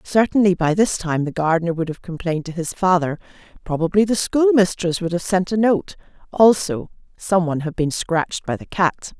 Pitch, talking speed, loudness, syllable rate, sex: 180 Hz, 175 wpm, -19 LUFS, 5.4 syllables/s, female